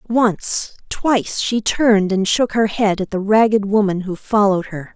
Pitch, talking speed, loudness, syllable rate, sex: 205 Hz, 180 wpm, -17 LUFS, 4.6 syllables/s, female